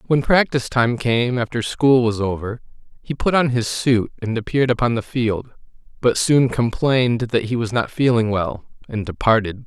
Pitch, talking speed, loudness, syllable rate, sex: 120 Hz, 180 wpm, -19 LUFS, 4.9 syllables/s, male